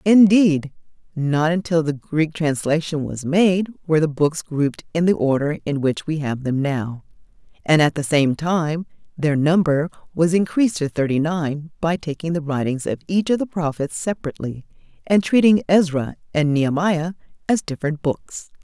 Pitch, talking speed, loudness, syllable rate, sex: 160 Hz, 165 wpm, -20 LUFS, 4.8 syllables/s, female